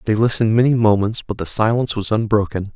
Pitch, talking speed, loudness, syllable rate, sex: 110 Hz, 195 wpm, -17 LUFS, 6.5 syllables/s, male